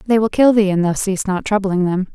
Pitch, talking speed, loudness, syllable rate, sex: 200 Hz, 280 wpm, -16 LUFS, 6.0 syllables/s, female